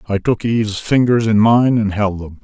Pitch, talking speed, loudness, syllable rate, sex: 110 Hz, 220 wpm, -15 LUFS, 4.9 syllables/s, male